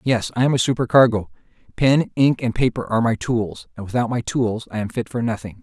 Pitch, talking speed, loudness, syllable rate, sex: 120 Hz, 225 wpm, -20 LUFS, 5.8 syllables/s, male